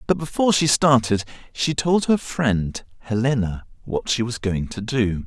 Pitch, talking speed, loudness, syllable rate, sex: 120 Hz, 170 wpm, -21 LUFS, 4.5 syllables/s, male